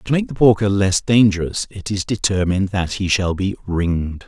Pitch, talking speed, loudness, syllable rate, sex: 100 Hz, 195 wpm, -18 LUFS, 5.2 syllables/s, male